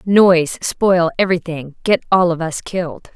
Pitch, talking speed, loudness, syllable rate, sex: 175 Hz, 150 wpm, -16 LUFS, 4.7 syllables/s, female